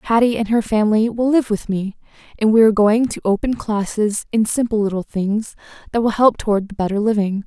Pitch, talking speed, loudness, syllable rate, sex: 215 Hz, 200 wpm, -18 LUFS, 5.6 syllables/s, female